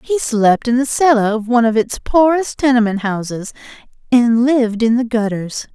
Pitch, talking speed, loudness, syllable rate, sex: 235 Hz, 180 wpm, -15 LUFS, 5.0 syllables/s, female